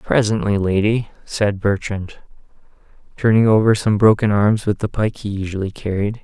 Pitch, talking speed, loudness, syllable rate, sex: 105 Hz, 145 wpm, -18 LUFS, 5.0 syllables/s, male